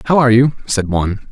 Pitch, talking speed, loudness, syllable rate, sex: 115 Hz, 230 wpm, -14 LUFS, 7.4 syllables/s, male